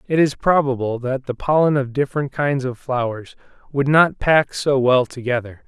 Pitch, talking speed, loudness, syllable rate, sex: 135 Hz, 180 wpm, -19 LUFS, 4.8 syllables/s, male